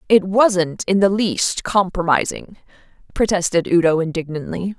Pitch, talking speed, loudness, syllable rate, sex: 185 Hz, 115 wpm, -18 LUFS, 4.5 syllables/s, female